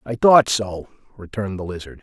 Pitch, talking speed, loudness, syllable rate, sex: 105 Hz, 180 wpm, -19 LUFS, 5.5 syllables/s, male